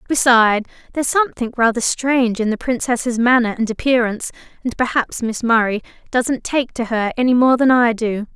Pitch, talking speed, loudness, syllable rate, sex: 240 Hz, 170 wpm, -17 LUFS, 5.5 syllables/s, female